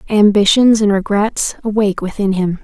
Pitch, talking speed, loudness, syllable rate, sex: 205 Hz, 135 wpm, -14 LUFS, 5.1 syllables/s, female